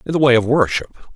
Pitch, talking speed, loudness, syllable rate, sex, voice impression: 130 Hz, 260 wpm, -16 LUFS, 7.9 syllables/s, male, masculine, middle-aged, tensed, powerful, hard, raspy, cool, intellectual, calm, mature, reassuring, wild, strict, slightly sharp